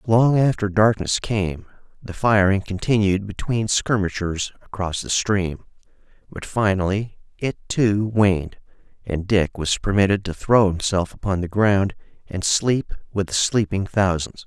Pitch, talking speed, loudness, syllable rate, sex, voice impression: 100 Hz, 135 wpm, -21 LUFS, 4.2 syllables/s, male, very masculine, middle-aged, thick, slightly relaxed, powerful, dark, soft, muffled, fluent, slightly raspy, cool, very intellectual, slightly refreshing, sincere, very calm, mature, very friendly, very reassuring, very unique, slightly elegant, wild, sweet, slightly lively, kind, very modest